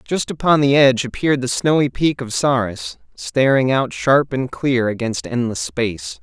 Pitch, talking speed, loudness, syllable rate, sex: 130 Hz, 175 wpm, -18 LUFS, 4.7 syllables/s, male